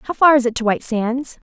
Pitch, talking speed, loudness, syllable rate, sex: 250 Hz, 280 wpm, -17 LUFS, 5.8 syllables/s, female